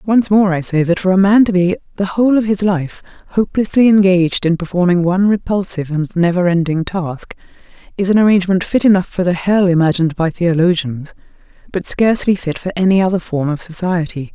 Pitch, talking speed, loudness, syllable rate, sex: 185 Hz, 190 wpm, -15 LUFS, 6.0 syllables/s, female